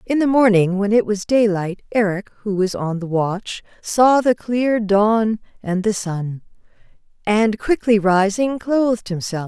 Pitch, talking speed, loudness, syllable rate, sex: 210 Hz, 160 wpm, -18 LUFS, 4.1 syllables/s, female